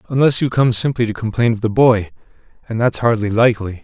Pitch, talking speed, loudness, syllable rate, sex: 115 Hz, 205 wpm, -16 LUFS, 6.2 syllables/s, male